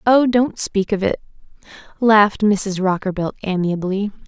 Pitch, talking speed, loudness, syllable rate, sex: 200 Hz, 125 wpm, -18 LUFS, 4.5 syllables/s, female